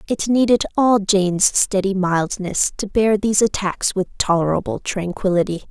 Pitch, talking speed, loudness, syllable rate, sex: 195 Hz, 135 wpm, -18 LUFS, 4.7 syllables/s, female